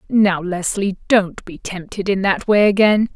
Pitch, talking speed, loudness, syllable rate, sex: 195 Hz, 170 wpm, -17 LUFS, 4.2 syllables/s, female